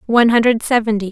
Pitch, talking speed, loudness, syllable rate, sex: 225 Hz, 160 wpm, -14 LUFS, 6.9 syllables/s, female